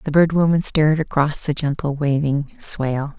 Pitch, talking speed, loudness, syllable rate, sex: 150 Hz, 170 wpm, -19 LUFS, 5.0 syllables/s, female